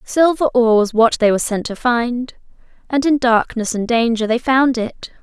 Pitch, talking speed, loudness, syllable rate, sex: 240 Hz, 195 wpm, -16 LUFS, 4.9 syllables/s, female